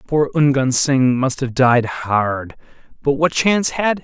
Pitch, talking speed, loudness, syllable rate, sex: 140 Hz, 180 wpm, -17 LUFS, 4.0 syllables/s, male